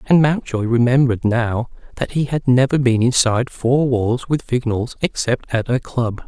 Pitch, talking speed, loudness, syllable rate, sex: 125 Hz, 170 wpm, -18 LUFS, 4.8 syllables/s, male